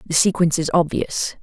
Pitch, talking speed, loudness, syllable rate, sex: 165 Hz, 170 wpm, -19 LUFS, 5.6 syllables/s, female